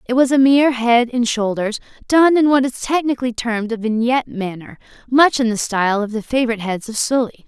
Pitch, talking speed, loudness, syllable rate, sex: 240 Hz, 210 wpm, -17 LUFS, 5.9 syllables/s, female